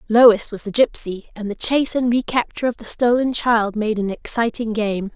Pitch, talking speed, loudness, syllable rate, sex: 225 Hz, 200 wpm, -19 LUFS, 5.1 syllables/s, female